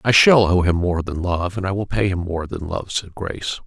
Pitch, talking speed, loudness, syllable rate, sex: 95 Hz, 280 wpm, -20 LUFS, 5.2 syllables/s, male